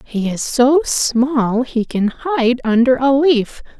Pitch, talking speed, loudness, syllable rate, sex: 255 Hz, 160 wpm, -16 LUFS, 3.2 syllables/s, female